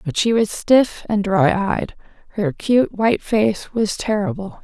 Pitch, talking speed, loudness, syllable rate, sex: 210 Hz, 170 wpm, -19 LUFS, 4.4 syllables/s, female